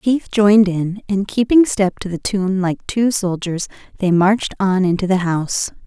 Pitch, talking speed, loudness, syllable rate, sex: 195 Hz, 185 wpm, -17 LUFS, 4.6 syllables/s, female